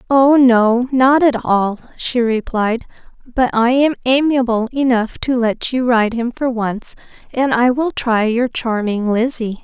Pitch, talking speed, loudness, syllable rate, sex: 240 Hz, 160 wpm, -16 LUFS, 3.9 syllables/s, female